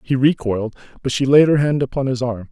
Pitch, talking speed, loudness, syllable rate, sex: 130 Hz, 240 wpm, -17 LUFS, 6.1 syllables/s, male